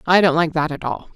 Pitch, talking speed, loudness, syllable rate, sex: 165 Hz, 310 wpm, -19 LUFS, 6.0 syllables/s, female